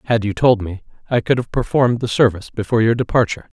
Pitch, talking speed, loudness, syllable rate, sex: 115 Hz, 215 wpm, -18 LUFS, 7.1 syllables/s, male